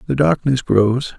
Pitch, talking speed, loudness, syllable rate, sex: 125 Hz, 150 wpm, -16 LUFS, 4.1 syllables/s, male